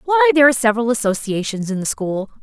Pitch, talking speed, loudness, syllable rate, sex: 240 Hz, 200 wpm, -17 LUFS, 6.9 syllables/s, female